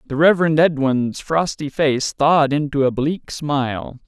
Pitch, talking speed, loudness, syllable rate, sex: 145 Hz, 145 wpm, -18 LUFS, 4.5 syllables/s, male